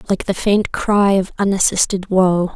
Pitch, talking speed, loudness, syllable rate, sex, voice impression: 190 Hz, 165 wpm, -16 LUFS, 4.4 syllables/s, female, feminine, slightly young, relaxed, slightly weak, clear, fluent, raspy, intellectual, calm, friendly, kind, modest